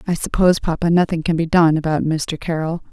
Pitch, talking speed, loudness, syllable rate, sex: 165 Hz, 205 wpm, -18 LUFS, 5.9 syllables/s, female